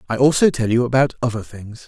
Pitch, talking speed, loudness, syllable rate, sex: 120 Hz, 225 wpm, -17 LUFS, 6.2 syllables/s, male